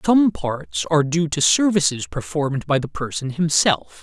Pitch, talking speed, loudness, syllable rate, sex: 155 Hz, 165 wpm, -20 LUFS, 4.7 syllables/s, male